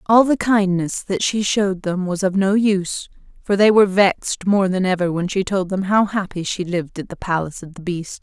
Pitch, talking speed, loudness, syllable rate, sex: 190 Hz, 235 wpm, -19 LUFS, 5.4 syllables/s, female